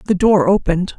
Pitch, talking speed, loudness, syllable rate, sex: 190 Hz, 185 wpm, -15 LUFS, 5.4 syllables/s, female